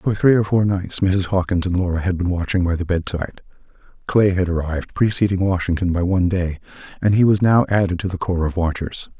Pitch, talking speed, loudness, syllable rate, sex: 90 Hz, 215 wpm, -19 LUFS, 5.9 syllables/s, male